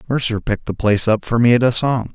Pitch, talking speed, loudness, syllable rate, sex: 115 Hz, 280 wpm, -17 LUFS, 6.7 syllables/s, male